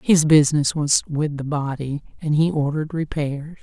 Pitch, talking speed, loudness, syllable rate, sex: 150 Hz, 165 wpm, -20 LUFS, 4.7 syllables/s, female